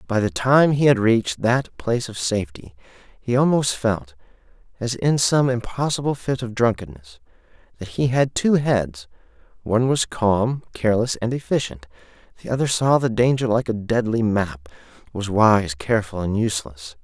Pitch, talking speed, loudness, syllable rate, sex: 115 Hz, 160 wpm, -21 LUFS, 4.3 syllables/s, male